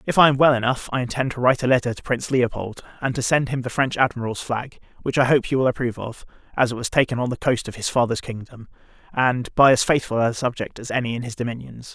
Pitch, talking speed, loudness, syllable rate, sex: 125 Hz, 255 wpm, -21 LUFS, 6.5 syllables/s, male